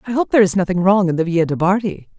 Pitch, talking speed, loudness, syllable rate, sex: 190 Hz, 300 wpm, -16 LUFS, 7.1 syllables/s, female